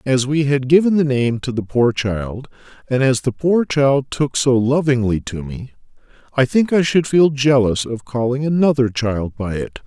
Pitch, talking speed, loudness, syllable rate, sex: 130 Hz, 195 wpm, -17 LUFS, 4.5 syllables/s, male